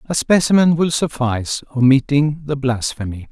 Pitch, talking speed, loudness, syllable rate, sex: 140 Hz, 125 wpm, -17 LUFS, 4.9 syllables/s, male